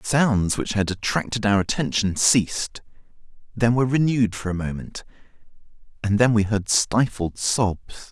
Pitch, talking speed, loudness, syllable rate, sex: 110 Hz, 150 wpm, -22 LUFS, 4.9 syllables/s, male